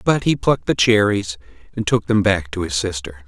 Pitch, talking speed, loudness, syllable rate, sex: 100 Hz, 220 wpm, -18 LUFS, 5.3 syllables/s, male